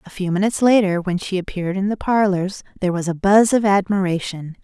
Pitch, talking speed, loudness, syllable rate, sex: 190 Hz, 205 wpm, -19 LUFS, 6.0 syllables/s, female